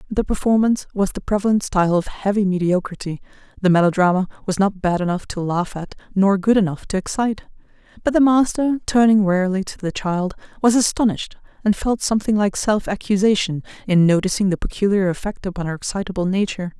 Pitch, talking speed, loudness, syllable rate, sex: 195 Hz, 170 wpm, -19 LUFS, 6.1 syllables/s, female